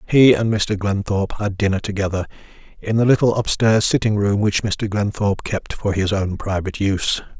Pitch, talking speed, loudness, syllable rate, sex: 105 Hz, 180 wpm, -19 LUFS, 5.4 syllables/s, male